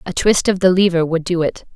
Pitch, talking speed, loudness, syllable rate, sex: 175 Hz, 275 wpm, -16 LUFS, 5.7 syllables/s, female